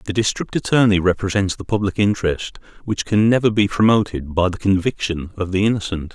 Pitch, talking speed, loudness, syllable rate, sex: 100 Hz, 175 wpm, -19 LUFS, 5.8 syllables/s, male